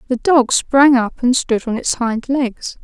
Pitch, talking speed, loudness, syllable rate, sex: 250 Hz, 210 wpm, -15 LUFS, 3.8 syllables/s, female